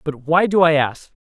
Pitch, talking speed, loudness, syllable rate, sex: 155 Hz, 245 wpm, -17 LUFS, 4.8 syllables/s, male